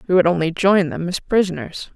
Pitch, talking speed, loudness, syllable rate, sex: 180 Hz, 215 wpm, -18 LUFS, 5.6 syllables/s, female